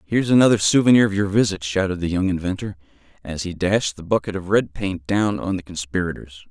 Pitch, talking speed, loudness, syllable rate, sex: 95 Hz, 205 wpm, -20 LUFS, 5.9 syllables/s, male